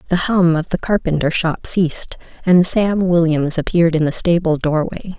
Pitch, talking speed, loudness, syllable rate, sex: 170 Hz, 175 wpm, -16 LUFS, 4.9 syllables/s, female